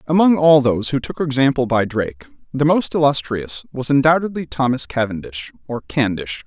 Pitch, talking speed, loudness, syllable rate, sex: 130 Hz, 160 wpm, -18 LUFS, 5.3 syllables/s, male